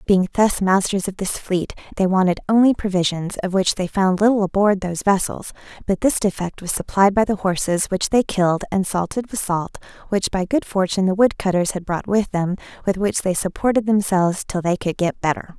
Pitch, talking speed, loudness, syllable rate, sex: 190 Hz, 210 wpm, -20 LUFS, 5.5 syllables/s, female